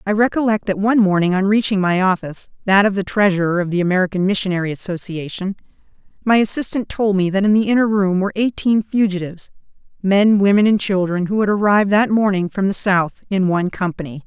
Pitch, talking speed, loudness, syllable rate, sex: 195 Hz, 190 wpm, -17 LUFS, 4.9 syllables/s, female